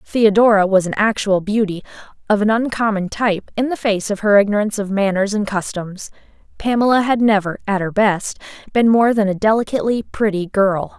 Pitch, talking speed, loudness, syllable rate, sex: 210 Hz, 175 wpm, -17 LUFS, 5.5 syllables/s, female